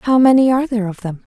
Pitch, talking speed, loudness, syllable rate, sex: 230 Hz, 265 wpm, -15 LUFS, 7.3 syllables/s, female